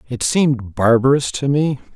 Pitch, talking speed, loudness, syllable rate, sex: 130 Hz, 155 wpm, -17 LUFS, 4.7 syllables/s, male